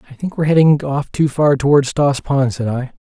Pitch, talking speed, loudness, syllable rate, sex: 140 Hz, 235 wpm, -16 LUFS, 5.5 syllables/s, male